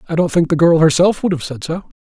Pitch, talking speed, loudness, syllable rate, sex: 165 Hz, 295 wpm, -15 LUFS, 6.3 syllables/s, male